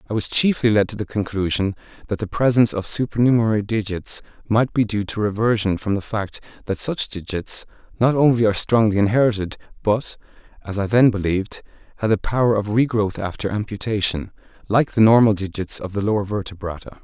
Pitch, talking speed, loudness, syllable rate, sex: 105 Hz, 175 wpm, -20 LUFS, 5.9 syllables/s, male